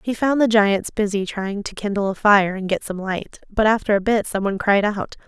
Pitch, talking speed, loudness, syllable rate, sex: 205 Hz, 240 wpm, -20 LUFS, 5.2 syllables/s, female